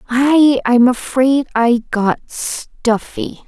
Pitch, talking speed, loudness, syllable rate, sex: 245 Hz, 85 wpm, -15 LUFS, 2.7 syllables/s, female